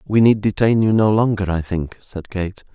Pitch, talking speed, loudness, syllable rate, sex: 100 Hz, 220 wpm, -18 LUFS, 4.8 syllables/s, male